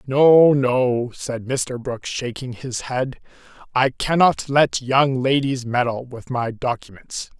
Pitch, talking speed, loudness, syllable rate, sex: 130 Hz, 140 wpm, -20 LUFS, 3.6 syllables/s, male